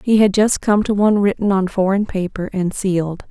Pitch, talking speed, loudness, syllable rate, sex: 195 Hz, 220 wpm, -17 LUFS, 5.3 syllables/s, female